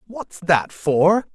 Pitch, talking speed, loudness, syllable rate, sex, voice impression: 185 Hz, 135 wpm, -19 LUFS, 2.6 syllables/s, male, masculine, adult-like, unique